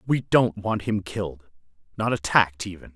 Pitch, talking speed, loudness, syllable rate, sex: 100 Hz, 160 wpm, -24 LUFS, 5.1 syllables/s, male